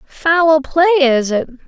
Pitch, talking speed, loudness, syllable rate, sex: 295 Hz, 145 wpm, -13 LUFS, 3.2 syllables/s, female